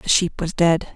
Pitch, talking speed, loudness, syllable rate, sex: 170 Hz, 255 wpm, -20 LUFS, 4.4 syllables/s, female